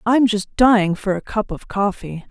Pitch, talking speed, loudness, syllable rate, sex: 205 Hz, 210 wpm, -18 LUFS, 4.7 syllables/s, female